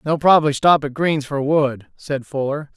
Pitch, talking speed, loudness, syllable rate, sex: 145 Hz, 195 wpm, -18 LUFS, 4.7 syllables/s, male